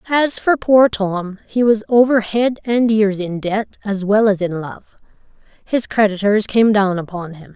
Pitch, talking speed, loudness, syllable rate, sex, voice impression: 210 Hz, 185 wpm, -16 LUFS, 4.2 syllables/s, female, feminine, adult-like, slightly clear, fluent, calm, elegant